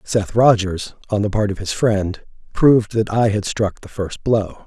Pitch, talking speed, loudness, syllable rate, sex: 105 Hz, 205 wpm, -18 LUFS, 4.3 syllables/s, male